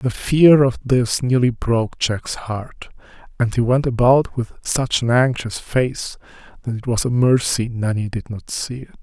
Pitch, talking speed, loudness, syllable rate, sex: 120 Hz, 180 wpm, -19 LUFS, 4.2 syllables/s, male